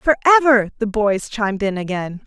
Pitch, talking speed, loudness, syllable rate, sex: 220 Hz, 185 wpm, -17 LUFS, 5.4 syllables/s, female